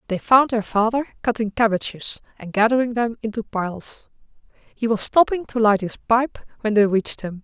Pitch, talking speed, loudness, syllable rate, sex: 225 Hz, 180 wpm, -21 LUFS, 5.2 syllables/s, female